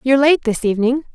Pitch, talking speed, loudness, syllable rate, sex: 255 Hz, 210 wpm, -16 LUFS, 7.2 syllables/s, female